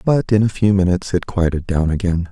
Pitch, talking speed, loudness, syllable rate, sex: 95 Hz, 235 wpm, -17 LUFS, 5.9 syllables/s, male